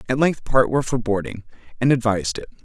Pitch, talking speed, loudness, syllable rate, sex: 125 Hz, 205 wpm, -21 LUFS, 6.7 syllables/s, male